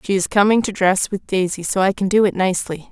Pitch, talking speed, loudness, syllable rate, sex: 195 Hz, 270 wpm, -18 LUFS, 6.1 syllables/s, female